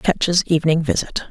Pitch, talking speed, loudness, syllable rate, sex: 160 Hz, 140 wpm, -18 LUFS, 4.8 syllables/s, female